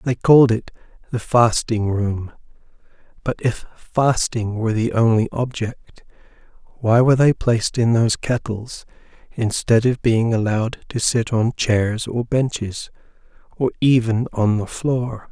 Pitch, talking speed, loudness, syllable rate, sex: 115 Hz, 135 wpm, -19 LUFS, 4.4 syllables/s, male